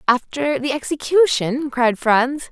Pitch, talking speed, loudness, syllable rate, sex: 270 Hz, 120 wpm, -18 LUFS, 3.8 syllables/s, female